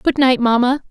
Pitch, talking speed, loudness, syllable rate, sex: 255 Hz, 200 wpm, -15 LUFS, 4.8 syllables/s, female